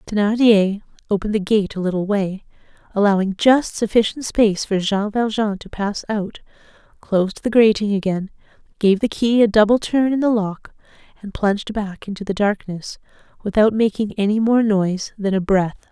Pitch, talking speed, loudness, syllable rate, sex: 205 Hz, 165 wpm, -19 LUFS, 5.2 syllables/s, female